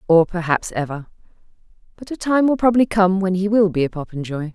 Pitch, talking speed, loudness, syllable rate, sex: 190 Hz, 170 wpm, -19 LUFS, 5.7 syllables/s, female